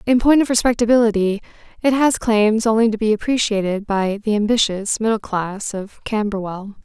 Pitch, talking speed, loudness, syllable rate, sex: 215 Hz, 160 wpm, -18 LUFS, 5.2 syllables/s, female